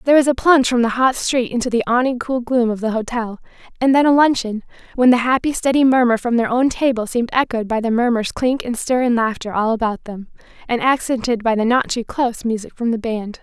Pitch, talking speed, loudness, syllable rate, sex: 240 Hz, 235 wpm, -17 LUFS, 5.9 syllables/s, female